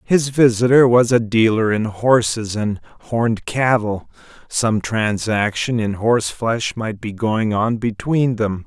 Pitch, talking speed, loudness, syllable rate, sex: 115 Hz, 140 wpm, -18 LUFS, 3.9 syllables/s, male